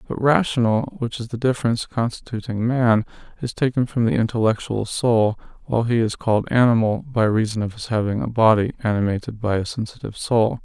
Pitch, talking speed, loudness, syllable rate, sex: 115 Hz, 175 wpm, -21 LUFS, 5.8 syllables/s, male